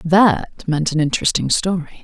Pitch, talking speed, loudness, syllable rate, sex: 170 Hz, 145 wpm, -17 LUFS, 5.1 syllables/s, female